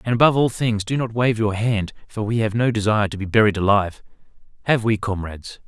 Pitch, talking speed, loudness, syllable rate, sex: 110 Hz, 210 wpm, -20 LUFS, 6.5 syllables/s, male